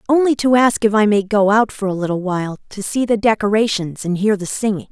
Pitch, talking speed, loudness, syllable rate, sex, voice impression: 210 Hz, 245 wpm, -17 LUFS, 5.8 syllables/s, female, feminine, middle-aged, tensed, powerful, slightly hard, clear, intellectual, unique, elegant, lively, intense, sharp